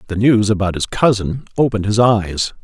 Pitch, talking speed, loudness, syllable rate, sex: 105 Hz, 180 wpm, -16 LUFS, 5.3 syllables/s, male